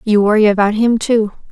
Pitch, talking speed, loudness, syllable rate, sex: 215 Hz, 195 wpm, -13 LUFS, 5.5 syllables/s, female